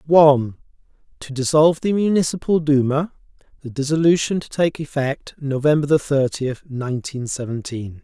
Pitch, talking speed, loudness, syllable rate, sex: 145 Hz, 110 wpm, -19 LUFS, 5.2 syllables/s, male